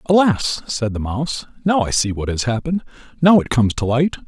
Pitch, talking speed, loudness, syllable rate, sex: 135 Hz, 210 wpm, -18 LUFS, 5.8 syllables/s, male